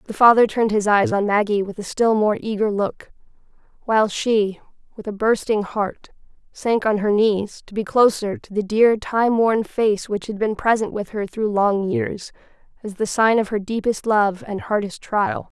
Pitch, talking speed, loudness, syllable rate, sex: 210 Hz, 195 wpm, -20 LUFS, 4.6 syllables/s, female